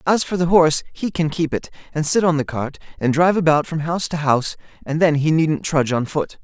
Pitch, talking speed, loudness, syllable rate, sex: 160 Hz, 250 wpm, -19 LUFS, 6.1 syllables/s, male